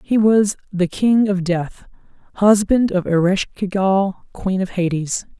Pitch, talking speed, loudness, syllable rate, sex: 195 Hz, 155 wpm, -18 LUFS, 3.9 syllables/s, female